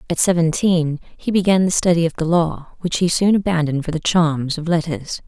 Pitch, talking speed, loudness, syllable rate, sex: 170 Hz, 205 wpm, -18 LUFS, 5.3 syllables/s, female